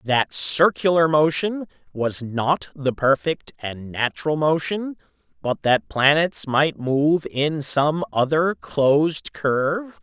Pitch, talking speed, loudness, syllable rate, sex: 150 Hz, 120 wpm, -21 LUFS, 3.4 syllables/s, male